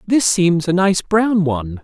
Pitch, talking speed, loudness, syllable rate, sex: 180 Hz, 195 wpm, -16 LUFS, 4.1 syllables/s, male